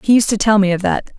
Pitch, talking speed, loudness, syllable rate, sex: 210 Hz, 355 wpm, -15 LUFS, 6.7 syllables/s, female